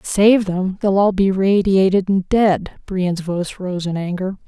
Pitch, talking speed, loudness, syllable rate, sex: 190 Hz, 160 wpm, -17 LUFS, 4.1 syllables/s, female